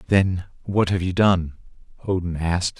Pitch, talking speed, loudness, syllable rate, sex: 90 Hz, 150 wpm, -22 LUFS, 4.7 syllables/s, male